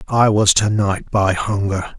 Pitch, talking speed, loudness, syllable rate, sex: 100 Hz, 180 wpm, -17 LUFS, 3.9 syllables/s, male